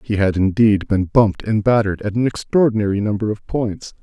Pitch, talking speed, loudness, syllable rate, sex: 105 Hz, 195 wpm, -18 LUFS, 5.7 syllables/s, male